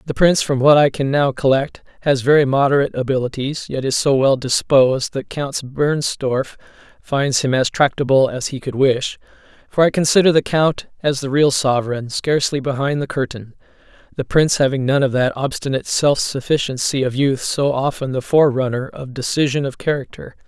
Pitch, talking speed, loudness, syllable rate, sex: 135 Hz, 175 wpm, -17 LUFS, 5.4 syllables/s, male